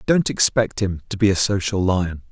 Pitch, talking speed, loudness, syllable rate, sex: 100 Hz, 205 wpm, -20 LUFS, 4.9 syllables/s, male